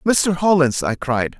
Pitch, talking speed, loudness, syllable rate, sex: 150 Hz, 170 wpm, -18 LUFS, 3.9 syllables/s, male